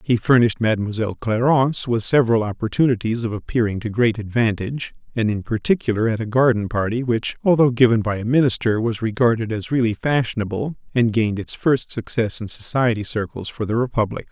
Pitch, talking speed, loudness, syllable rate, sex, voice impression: 115 Hz, 170 wpm, -20 LUFS, 6.0 syllables/s, male, masculine, adult-like, tensed, powerful, bright, clear, fluent, cool, intellectual, friendly, reassuring, wild, slightly kind